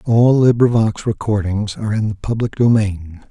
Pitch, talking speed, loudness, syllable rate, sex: 110 Hz, 145 wpm, -16 LUFS, 5.0 syllables/s, male